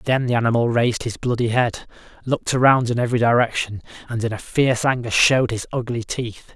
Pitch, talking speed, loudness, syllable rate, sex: 120 Hz, 185 wpm, -20 LUFS, 5.9 syllables/s, male